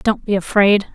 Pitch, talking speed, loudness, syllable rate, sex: 200 Hz, 190 wpm, -16 LUFS, 4.7 syllables/s, female